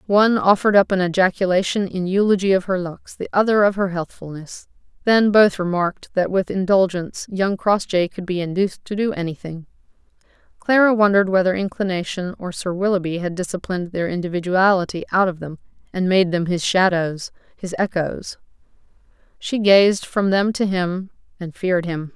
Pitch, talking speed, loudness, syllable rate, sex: 185 Hz, 160 wpm, -19 LUFS, 5.4 syllables/s, female